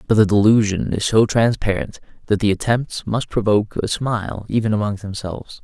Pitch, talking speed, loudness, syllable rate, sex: 105 Hz, 170 wpm, -19 LUFS, 5.5 syllables/s, male